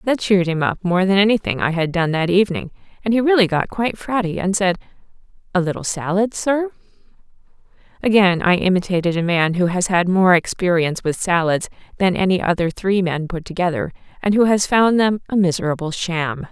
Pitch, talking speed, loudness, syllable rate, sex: 185 Hz, 185 wpm, -18 LUFS, 5.7 syllables/s, female